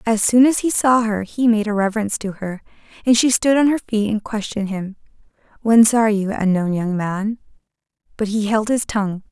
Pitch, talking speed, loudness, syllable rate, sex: 215 Hz, 205 wpm, -18 LUFS, 5.6 syllables/s, female